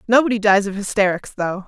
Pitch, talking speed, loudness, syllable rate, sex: 205 Hz, 180 wpm, -18 LUFS, 6.2 syllables/s, female